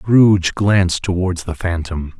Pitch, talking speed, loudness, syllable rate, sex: 90 Hz, 135 wpm, -17 LUFS, 4.3 syllables/s, male